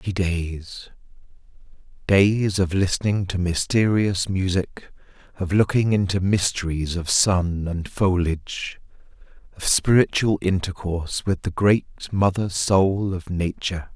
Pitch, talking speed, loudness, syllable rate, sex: 95 Hz, 110 wpm, -22 LUFS, 4.1 syllables/s, male